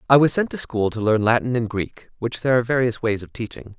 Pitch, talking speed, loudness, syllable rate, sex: 120 Hz, 270 wpm, -21 LUFS, 6.3 syllables/s, male